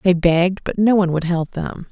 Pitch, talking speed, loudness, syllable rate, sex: 180 Hz, 250 wpm, -18 LUFS, 5.5 syllables/s, female